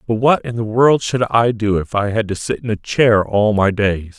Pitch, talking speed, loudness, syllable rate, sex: 110 Hz, 275 wpm, -16 LUFS, 4.8 syllables/s, male